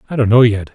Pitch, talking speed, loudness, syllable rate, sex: 115 Hz, 325 wpm, -13 LUFS, 7.4 syllables/s, male